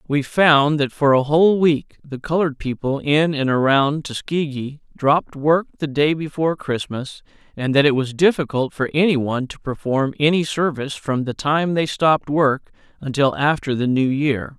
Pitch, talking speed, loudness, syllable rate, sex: 145 Hz, 175 wpm, -19 LUFS, 4.8 syllables/s, male